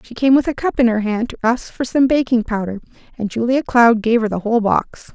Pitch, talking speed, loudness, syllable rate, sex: 235 Hz, 255 wpm, -17 LUFS, 5.6 syllables/s, female